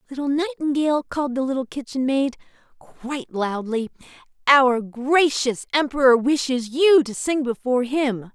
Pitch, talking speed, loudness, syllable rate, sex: 265 Hz, 130 wpm, -21 LUFS, 4.7 syllables/s, female